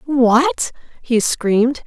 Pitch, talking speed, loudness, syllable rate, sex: 235 Hz, 95 wpm, -16 LUFS, 2.8 syllables/s, female